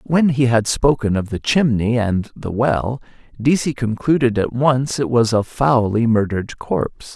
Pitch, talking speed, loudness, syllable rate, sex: 120 Hz, 170 wpm, -18 LUFS, 4.4 syllables/s, male